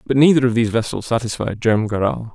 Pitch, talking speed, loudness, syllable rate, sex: 115 Hz, 205 wpm, -18 LUFS, 6.3 syllables/s, male